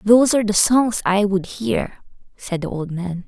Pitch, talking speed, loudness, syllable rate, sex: 200 Hz, 200 wpm, -19 LUFS, 4.7 syllables/s, female